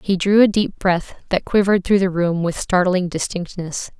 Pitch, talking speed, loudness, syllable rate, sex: 185 Hz, 195 wpm, -18 LUFS, 4.8 syllables/s, female